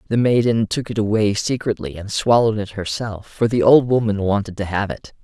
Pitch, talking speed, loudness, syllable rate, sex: 105 Hz, 205 wpm, -19 LUFS, 5.4 syllables/s, male